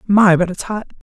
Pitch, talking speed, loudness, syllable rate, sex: 195 Hz, 215 wpm, -15 LUFS, 5.3 syllables/s, female